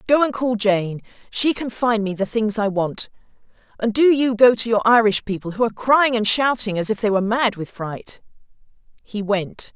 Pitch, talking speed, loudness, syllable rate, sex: 220 Hz, 205 wpm, -19 LUFS, 5.0 syllables/s, female